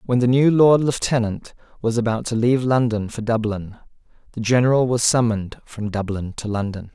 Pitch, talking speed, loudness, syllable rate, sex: 115 Hz, 175 wpm, -20 LUFS, 5.4 syllables/s, male